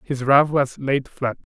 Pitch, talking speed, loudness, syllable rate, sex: 135 Hz, 190 wpm, -20 LUFS, 3.9 syllables/s, male